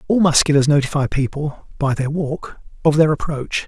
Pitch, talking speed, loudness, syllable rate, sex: 145 Hz, 165 wpm, -18 LUFS, 5.1 syllables/s, male